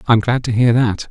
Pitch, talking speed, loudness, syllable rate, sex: 115 Hz, 270 wpm, -15 LUFS, 5.3 syllables/s, male